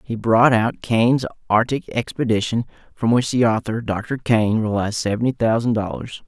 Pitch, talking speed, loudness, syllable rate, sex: 115 Hz, 155 wpm, -20 LUFS, 5.0 syllables/s, male